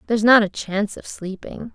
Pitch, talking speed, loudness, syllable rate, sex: 210 Hz, 205 wpm, -19 LUFS, 5.7 syllables/s, female